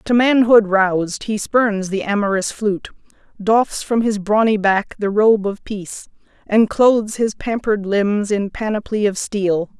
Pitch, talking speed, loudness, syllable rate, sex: 210 Hz, 160 wpm, -17 LUFS, 4.4 syllables/s, female